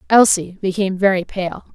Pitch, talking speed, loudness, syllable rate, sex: 190 Hz, 140 wpm, -17 LUFS, 5.2 syllables/s, female